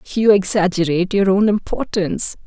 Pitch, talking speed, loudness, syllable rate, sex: 190 Hz, 120 wpm, -17 LUFS, 5.7 syllables/s, female